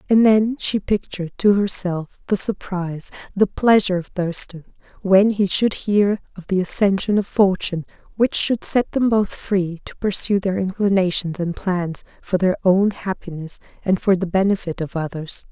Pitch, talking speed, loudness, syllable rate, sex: 190 Hz, 165 wpm, -20 LUFS, 4.7 syllables/s, female